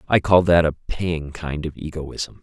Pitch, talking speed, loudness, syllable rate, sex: 80 Hz, 200 wpm, -21 LUFS, 4.0 syllables/s, male